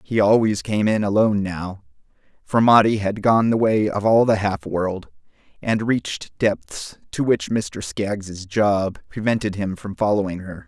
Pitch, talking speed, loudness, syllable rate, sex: 105 Hz, 170 wpm, -20 LUFS, 4.2 syllables/s, male